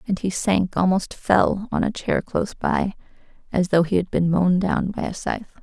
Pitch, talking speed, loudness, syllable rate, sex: 190 Hz, 215 wpm, -22 LUFS, 4.9 syllables/s, female